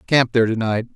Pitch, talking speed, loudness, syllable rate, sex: 115 Hz, 190 wpm, -19 LUFS, 6.8 syllables/s, male